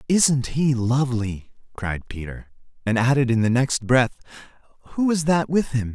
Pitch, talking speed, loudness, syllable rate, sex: 130 Hz, 160 wpm, -22 LUFS, 4.7 syllables/s, male